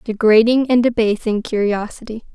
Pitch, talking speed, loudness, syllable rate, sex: 225 Hz, 100 wpm, -16 LUFS, 5.1 syllables/s, female